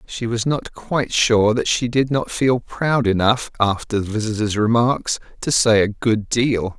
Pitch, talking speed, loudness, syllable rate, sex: 115 Hz, 185 wpm, -19 LUFS, 4.3 syllables/s, male